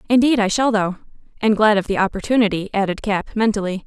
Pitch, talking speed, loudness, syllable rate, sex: 210 Hz, 170 wpm, -18 LUFS, 6.2 syllables/s, female